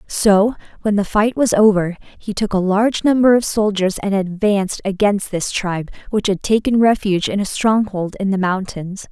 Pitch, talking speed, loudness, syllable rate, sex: 200 Hz, 185 wpm, -17 LUFS, 5.0 syllables/s, female